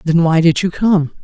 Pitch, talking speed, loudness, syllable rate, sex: 170 Hz, 245 wpm, -14 LUFS, 4.7 syllables/s, female